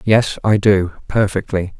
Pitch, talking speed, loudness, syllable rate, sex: 100 Hz, 135 wpm, -17 LUFS, 4.1 syllables/s, male